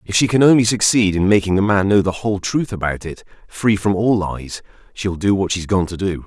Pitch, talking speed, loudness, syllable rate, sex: 100 Hz, 250 wpm, -17 LUFS, 5.5 syllables/s, male